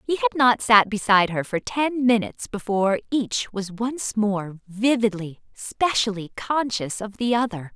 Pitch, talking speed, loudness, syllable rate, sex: 220 Hz, 155 wpm, -22 LUFS, 4.6 syllables/s, female